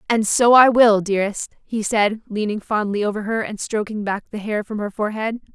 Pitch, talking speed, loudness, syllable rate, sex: 215 Hz, 205 wpm, -19 LUFS, 5.4 syllables/s, female